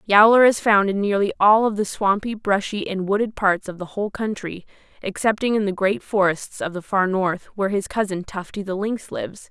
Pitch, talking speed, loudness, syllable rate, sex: 200 Hz, 210 wpm, -21 LUFS, 5.3 syllables/s, female